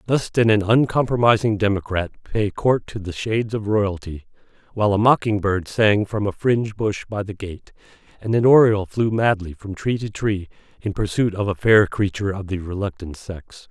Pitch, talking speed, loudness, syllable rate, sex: 105 Hz, 190 wpm, -20 LUFS, 5.2 syllables/s, male